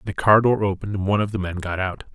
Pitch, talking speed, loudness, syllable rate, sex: 100 Hz, 305 wpm, -21 LUFS, 7.1 syllables/s, male